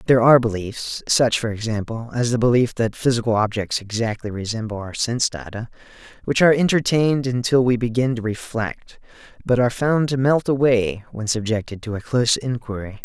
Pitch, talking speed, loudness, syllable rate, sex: 115 Hz, 165 wpm, -20 LUFS, 5.7 syllables/s, male